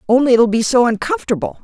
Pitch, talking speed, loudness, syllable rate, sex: 245 Hz, 220 wpm, -15 LUFS, 7.5 syllables/s, female